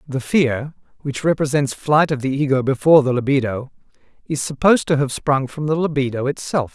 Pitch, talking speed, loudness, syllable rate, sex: 140 Hz, 180 wpm, -19 LUFS, 5.5 syllables/s, male